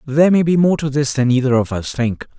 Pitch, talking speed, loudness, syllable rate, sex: 135 Hz, 275 wpm, -16 LUFS, 5.9 syllables/s, male